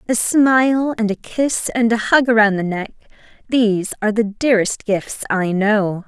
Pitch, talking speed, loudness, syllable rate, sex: 220 Hz, 180 wpm, -17 LUFS, 4.7 syllables/s, female